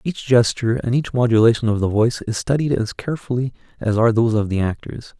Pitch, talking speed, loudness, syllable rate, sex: 115 Hz, 210 wpm, -19 LUFS, 6.5 syllables/s, male